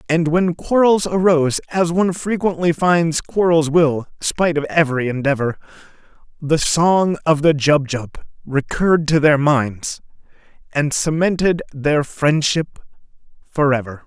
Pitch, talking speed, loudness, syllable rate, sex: 155 Hz, 120 wpm, -17 LUFS, 4.4 syllables/s, male